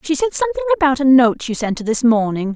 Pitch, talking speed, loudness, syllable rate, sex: 270 Hz, 260 wpm, -16 LUFS, 6.7 syllables/s, female